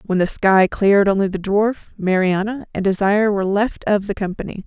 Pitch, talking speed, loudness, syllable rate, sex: 200 Hz, 195 wpm, -18 LUFS, 5.7 syllables/s, female